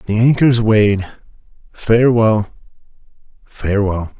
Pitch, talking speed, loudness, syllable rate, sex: 110 Hz, 70 wpm, -14 LUFS, 4.1 syllables/s, male